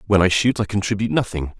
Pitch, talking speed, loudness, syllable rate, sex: 100 Hz, 225 wpm, -20 LUFS, 7.2 syllables/s, male